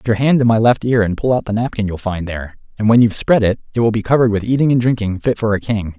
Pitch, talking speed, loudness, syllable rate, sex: 110 Hz, 320 wpm, -16 LUFS, 7.1 syllables/s, male